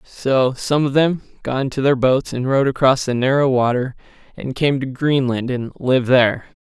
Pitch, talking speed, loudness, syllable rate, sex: 130 Hz, 190 wpm, -18 LUFS, 5.0 syllables/s, male